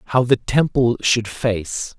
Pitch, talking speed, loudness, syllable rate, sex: 120 Hz, 150 wpm, -19 LUFS, 3.6 syllables/s, male